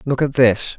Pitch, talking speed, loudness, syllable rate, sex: 125 Hz, 230 wpm, -16 LUFS, 4.5 syllables/s, male